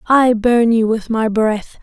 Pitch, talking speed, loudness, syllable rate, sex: 225 Hz, 195 wpm, -15 LUFS, 3.5 syllables/s, female